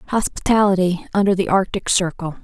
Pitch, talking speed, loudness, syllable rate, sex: 190 Hz, 125 wpm, -18 LUFS, 5.2 syllables/s, female